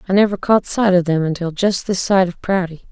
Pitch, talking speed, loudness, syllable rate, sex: 185 Hz, 245 wpm, -17 LUFS, 5.5 syllables/s, female